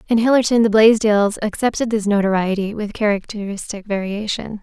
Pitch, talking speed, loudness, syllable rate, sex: 210 Hz, 130 wpm, -18 LUFS, 5.4 syllables/s, female